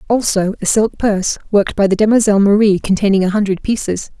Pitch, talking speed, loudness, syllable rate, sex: 205 Hz, 185 wpm, -14 LUFS, 6.4 syllables/s, female